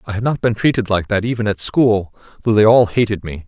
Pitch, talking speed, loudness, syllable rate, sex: 105 Hz, 260 wpm, -16 LUFS, 5.9 syllables/s, male